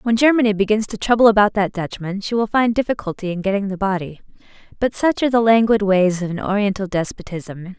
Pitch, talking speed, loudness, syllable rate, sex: 205 Hz, 200 wpm, -18 LUFS, 6.1 syllables/s, female